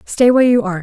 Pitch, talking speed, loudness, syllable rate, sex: 220 Hz, 290 wpm, -13 LUFS, 8.2 syllables/s, female